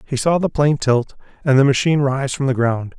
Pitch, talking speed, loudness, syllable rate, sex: 135 Hz, 240 wpm, -17 LUFS, 5.8 syllables/s, male